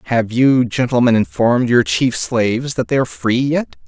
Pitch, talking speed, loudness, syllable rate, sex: 120 Hz, 185 wpm, -16 LUFS, 5.0 syllables/s, male